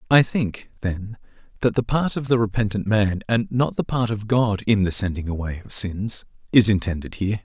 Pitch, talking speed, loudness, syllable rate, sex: 105 Hz, 200 wpm, -22 LUFS, 5.1 syllables/s, male